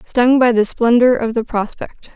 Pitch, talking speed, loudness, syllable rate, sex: 235 Hz, 195 wpm, -14 LUFS, 4.5 syllables/s, female